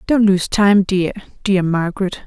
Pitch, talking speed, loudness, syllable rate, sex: 195 Hz, 160 wpm, -16 LUFS, 4.4 syllables/s, female